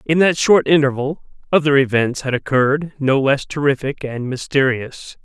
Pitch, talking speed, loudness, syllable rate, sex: 140 Hz, 150 wpm, -17 LUFS, 4.8 syllables/s, male